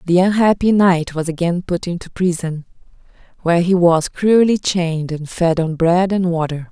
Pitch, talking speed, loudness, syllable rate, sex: 175 Hz, 170 wpm, -16 LUFS, 4.8 syllables/s, female